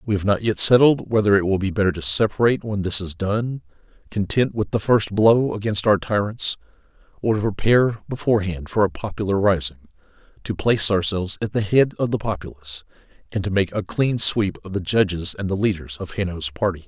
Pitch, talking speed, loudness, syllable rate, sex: 100 Hz, 200 wpm, -20 LUFS, 5.8 syllables/s, male